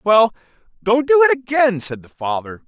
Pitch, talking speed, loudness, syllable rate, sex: 220 Hz, 180 wpm, -17 LUFS, 4.8 syllables/s, male